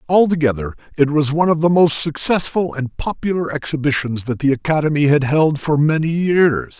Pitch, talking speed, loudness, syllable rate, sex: 150 Hz, 170 wpm, -17 LUFS, 5.3 syllables/s, male